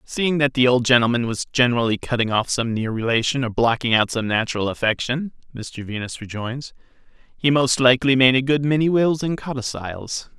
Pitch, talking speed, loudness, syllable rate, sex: 125 Hz, 180 wpm, -20 LUFS, 5.4 syllables/s, male